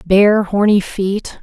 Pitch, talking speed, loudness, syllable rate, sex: 200 Hz, 125 wpm, -14 LUFS, 3.1 syllables/s, female